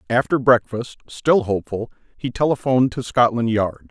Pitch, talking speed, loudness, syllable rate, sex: 120 Hz, 140 wpm, -19 LUFS, 5.0 syllables/s, male